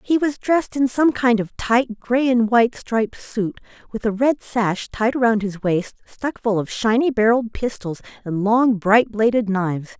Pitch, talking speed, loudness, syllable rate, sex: 230 Hz, 190 wpm, -20 LUFS, 4.6 syllables/s, female